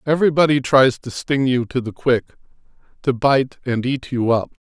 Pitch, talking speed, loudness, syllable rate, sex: 130 Hz, 180 wpm, -18 LUFS, 4.8 syllables/s, male